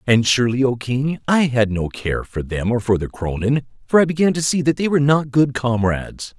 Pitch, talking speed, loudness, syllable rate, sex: 130 Hz, 235 wpm, -19 LUFS, 5.4 syllables/s, male